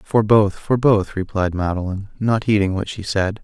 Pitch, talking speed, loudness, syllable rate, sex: 100 Hz, 190 wpm, -19 LUFS, 4.9 syllables/s, male